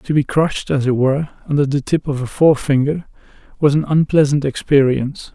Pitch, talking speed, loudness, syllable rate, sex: 140 Hz, 180 wpm, -17 LUFS, 5.9 syllables/s, male